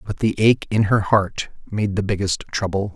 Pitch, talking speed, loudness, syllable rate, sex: 100 Hz, 205 wpm, -20 LUFS, 4.8 syllables/s, male